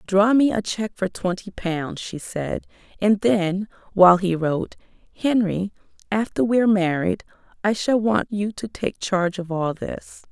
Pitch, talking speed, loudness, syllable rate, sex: 195 Hz, 165 wpm, -22 LUFS, 4.5 syllables/s, female